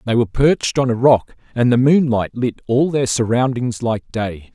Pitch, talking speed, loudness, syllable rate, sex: 120 Hz, 200 wpm, -17 LUFS, 4.8 syllables/s, male